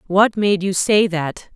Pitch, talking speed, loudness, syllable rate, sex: 190 Hz, 195 wpm, -17 LUFS, 3.7 syllables/s, female